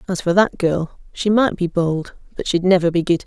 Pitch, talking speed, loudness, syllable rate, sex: 180 Hz, 240 wpm, -18 LUFS, 5.5 syllables/s, female